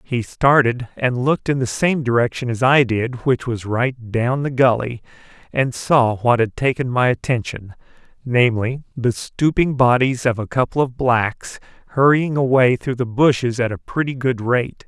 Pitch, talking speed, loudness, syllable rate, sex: 125 Hz, 175 wpm, -18 LUFS, 4.5 syllables/s, male